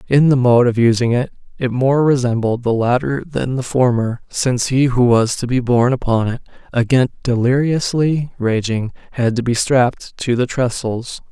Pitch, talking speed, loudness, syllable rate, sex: 125 Hz, 175 wpm, -17 LUFS, 4.8 syllables/s, male